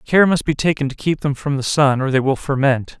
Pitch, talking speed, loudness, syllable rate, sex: 140 Hz, 280 wpm, -18 LUFS, 5.5 syllables/s, male